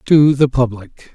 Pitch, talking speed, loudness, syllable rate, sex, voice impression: 130 Hz, 155 wpm, -14 LUFS, 3.9 syllables/s, male, very masculine, old, very thick, very relaxed, very weak, dark, very soft, muffled, slightly halting, raspy, slightly cool, slightly intellectual, slightly refreshing, sincere, very calm, very mature, slightly friendly, slightly reassuring, very unique, slightly elegant, wild, slightly sweet, kind, very modest